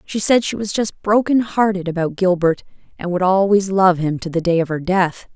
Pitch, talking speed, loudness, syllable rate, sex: 190 Hz, 225 wpm, -17 LUFS, 5.1 syllables/s, female